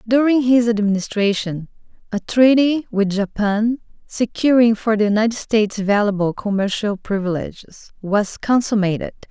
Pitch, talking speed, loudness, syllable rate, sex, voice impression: 215 Hz, 110 wpm, -18 LUFS, 4.8 syllables/s, female, feminine, very adult-like, slightly clear, sincere, slightly elegant